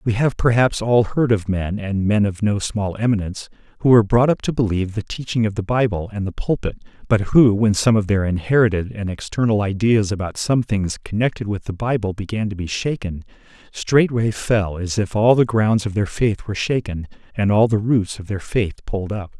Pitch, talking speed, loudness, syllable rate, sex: 105 Hz, 215 wpm, -19 LUFS, 5.4 syllables/s, male